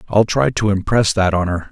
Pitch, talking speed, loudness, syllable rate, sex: 100 Hz, 245 wpm, -16 LUFS, 5.2 syllables/s, male